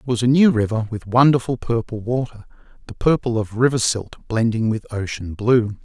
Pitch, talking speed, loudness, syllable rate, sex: 115 Hz, 175 wpm, -19 LUFS, 5.3 syllables/s, male